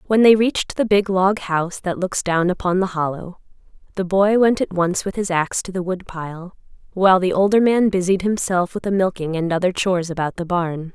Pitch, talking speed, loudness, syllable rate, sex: 185 Hz, 215 wpm, -19 LUFS, 5.5 syllables/s, female